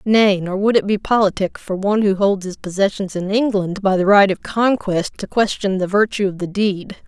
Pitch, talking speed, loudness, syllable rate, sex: 200 Hz, 220 wpm, -18 LUFS, 5.1 syllables/s, female